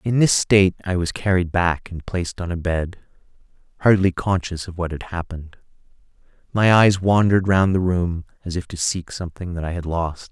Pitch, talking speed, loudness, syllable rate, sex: 90 Hz, 190 wpm, -20 LUFS, 5.4 syllables/s, male